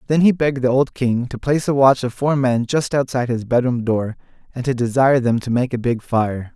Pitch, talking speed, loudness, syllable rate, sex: 125 Hz, 245 wpm, -18 LUFS, 5.7 syllables/s, male